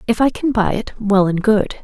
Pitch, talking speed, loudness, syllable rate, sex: 215 Hz, 260 wpm, -17 LUFS, 5.1 syllables/s, female